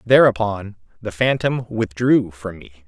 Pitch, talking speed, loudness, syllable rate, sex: 105 Hz, 125 wpm, -19 LUFS, 4.0 syllables/s, male